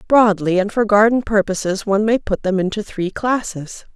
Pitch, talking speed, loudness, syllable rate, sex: 205 Hz, 180 wpm, -17 LUFS, 5.2 syllables/s, female